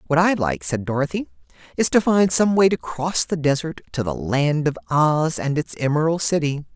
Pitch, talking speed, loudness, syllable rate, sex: 150 Hz, 205 wpm, -20 LUFS, 5.0 syllables/s, male